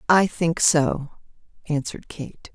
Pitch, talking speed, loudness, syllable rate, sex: 160 Hz, 120 wpm, -22 LUFS, 3.9 syllables/s, female